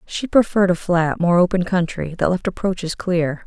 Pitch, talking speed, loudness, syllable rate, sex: 180 Hz, 190 wpm, -19 LUFS, 5.1 syllables/s, female